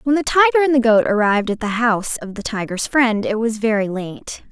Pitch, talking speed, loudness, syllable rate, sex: 230 Hz, 240 wpm, -17 LUFS, 5.9 syllables/s, female